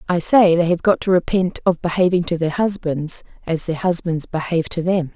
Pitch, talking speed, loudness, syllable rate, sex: 170 Hz, 210 wpm, -19 LUFS, 5.3 syllables/s, female